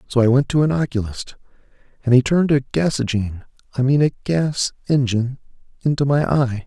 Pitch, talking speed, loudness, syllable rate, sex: 130 Hz, 155 wpm, -19 LUFS, 5.8 syllables/s, male